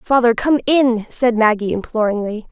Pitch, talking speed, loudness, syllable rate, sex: 230 Hz, 145 wpm, -16 LUFS, 4.7 syllables/s, female